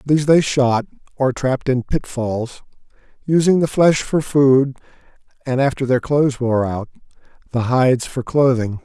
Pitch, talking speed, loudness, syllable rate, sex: 130 Hz, 150 wpm, -18 LUFS, 4.7 syllables/s, male